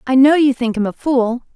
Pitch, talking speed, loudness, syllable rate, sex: 255 Hz, 270 wpm, -15 LUFS, 5.3 syllables/s, female